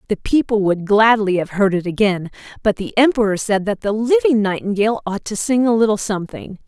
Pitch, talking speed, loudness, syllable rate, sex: 210 Hz, 200 wpm, -17 LUFS, 5.6 syllables/s, female